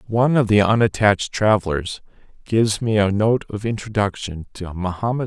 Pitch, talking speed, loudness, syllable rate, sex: 105 Hz, 150 wpm, -19 LUFS, 5.5 syllables/s, male